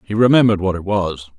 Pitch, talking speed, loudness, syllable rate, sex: 100 Hz, 215 wpm, -16 LUFS, 6.5 syllables/s, male